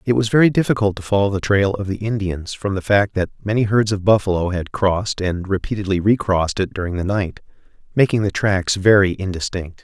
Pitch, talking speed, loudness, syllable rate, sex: 100 Hz, 200 wpm, -19 LUFS, 5.7 syllables/s, male